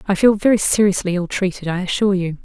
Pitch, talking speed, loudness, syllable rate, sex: 190 Hz, 220 wpm, -17 LUFS, 6.7 syllables/s, female